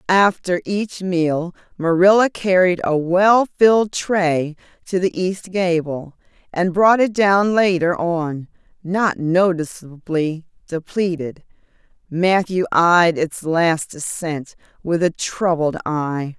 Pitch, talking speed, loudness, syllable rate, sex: 175 Hz, 115 wpm, -18 LUFS, 3.4 syllables/s, female